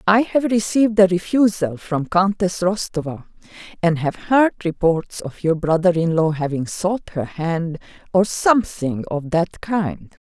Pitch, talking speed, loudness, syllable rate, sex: 180 Hz, 150 wpm, -19 LUFS, 4.2 syllables/s, female